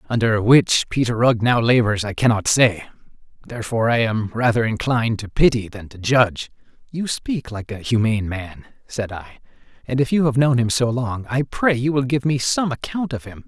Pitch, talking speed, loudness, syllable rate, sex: 120 Hz, 200 wpm, -19 LUFS, 5.3 syllables/s, male